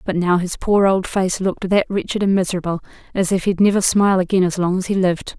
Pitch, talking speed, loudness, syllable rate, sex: 185 Hz, 245 wpm, -18 LUFS, 6.3 syllables/s, female